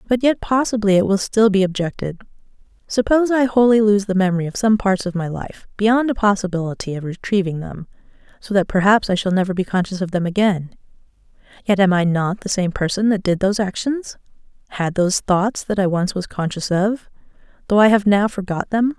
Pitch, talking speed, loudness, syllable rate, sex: 200 Hz, 195 wpm, -18 LUFS, 5.7 syllables/s, female